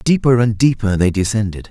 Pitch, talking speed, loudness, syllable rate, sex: 110 Hz, 175 wpm, -15 LUFS, 5.6 syllables/s, male